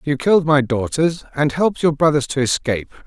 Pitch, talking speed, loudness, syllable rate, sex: 145 Hz, 195 wpm, -18 LUFS, 5.8 syllables/s, male